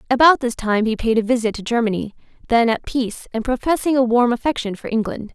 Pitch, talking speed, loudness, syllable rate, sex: 235 Hz, 215 wpm, -19 LUFS, 6.1 syllables/s, female